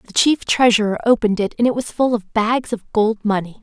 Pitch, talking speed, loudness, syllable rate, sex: 225 Hz, 230 wpm, -18 LUFS, 5.5 syllables/s, female